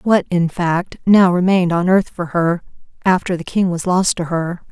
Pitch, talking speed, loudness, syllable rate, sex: 180 Hz, 205 wpm, -17 LUFS, 4.7 syllables/s, female